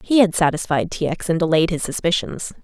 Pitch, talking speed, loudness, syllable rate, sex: 175 Hz, 205 wpm, -19 LUFS, 5.7 syllables/s, female